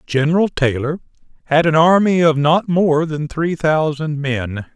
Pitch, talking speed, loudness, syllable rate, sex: 155 Hz, 150 wpm, -16 LUFS, 4.2 syllables/s, male